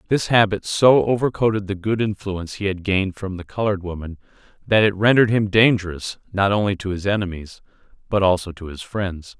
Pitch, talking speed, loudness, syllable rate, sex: 100 Hz, 190 wpm, -20 LUFS, 5.8 syllables/s, male